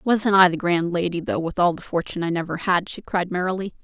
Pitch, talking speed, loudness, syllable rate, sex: 180 Hz, 250 wpm, -22 LUFS, 5.9 syllables/s, female